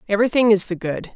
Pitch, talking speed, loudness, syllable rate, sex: 205 Hz, 210 wpm, -18 LUFS, 7.2 syllables/s, female